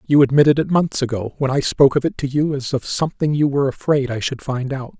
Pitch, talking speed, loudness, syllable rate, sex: 135 Hz, 265 wpm, -18 LUFS, 6.2 syllables/s, male